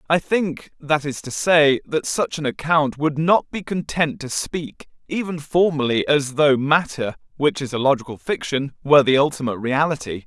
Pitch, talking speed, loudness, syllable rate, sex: 145 Hz, 175 wpm, -20 LUFS, 4.8 syllables/s, male